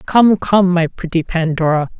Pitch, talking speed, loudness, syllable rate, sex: 175 Hz, 150 wpm, -15 LUFS, 4.4 syllables/s, female